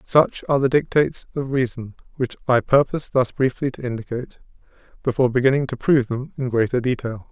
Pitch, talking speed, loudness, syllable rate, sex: 130 Hz, 170 wpm, -21 LUFS, 6.2 syllables/s, male